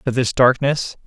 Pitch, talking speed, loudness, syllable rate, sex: 130 Hz, 170 wpm, -17 LUFS, 4.4 syllables/s, male